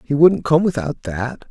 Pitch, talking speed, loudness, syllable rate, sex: 145 Hz, 200 wpm, -18 LUFS, 4.3 syllables/s, male